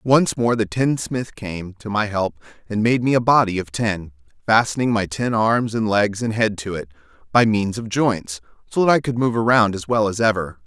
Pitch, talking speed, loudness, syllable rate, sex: 110 Hz, 220 wpm, -20 LUFS, 4.8 syllables/s, male